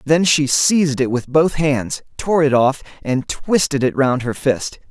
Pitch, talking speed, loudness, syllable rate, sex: 140 Hz, 195 wpm, -17 LUFS, 4.1 syllables/s, male